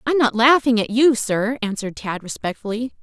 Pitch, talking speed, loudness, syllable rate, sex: 235 Hz, 200 wpm, -19 LUFS, 5.8 syllables/s, female